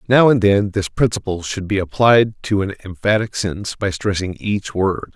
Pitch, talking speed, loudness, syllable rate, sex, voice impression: 100 Hz, 185 wpm, -18 LUFS, 4.9 syllables/s, male, very masculine, very adult-like, very middle-aged, slightly tensed, slightly powerful, slightly dark, hard, slightly clear, fluent, cool, intellectual, slightly refreshing, calm, mature, friendly, reassuring, slightly unique, slightly elegant, wild, slightly sweet, slightly lively, kind